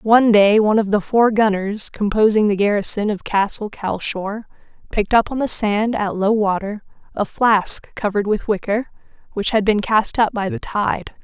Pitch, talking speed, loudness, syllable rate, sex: 210 Hz, 180 wpm, -18 LUFS, 4.8 syllables/s, female